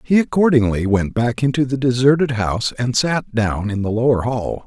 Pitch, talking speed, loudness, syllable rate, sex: 120 Hz, 195 wpm, -18 LUFS, 5.0 syllables/s, male